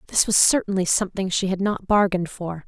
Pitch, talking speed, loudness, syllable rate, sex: 190 Hz, 200 wpm, -21 LUFS, 6.2 syllables/s, female